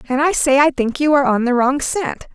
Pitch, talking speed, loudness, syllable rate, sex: 275 Hz, 280 wpm, -16 LUFS, 5.6 syllables/s, female